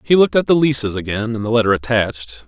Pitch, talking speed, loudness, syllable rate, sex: 115 Hz, 245 wpm, -16 LUFS, 7.1 syllables/s, male